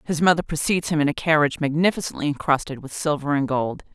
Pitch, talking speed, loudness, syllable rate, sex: 150 Hz, 200 wpm, -22 LUFS, 6.6 syllables/s, female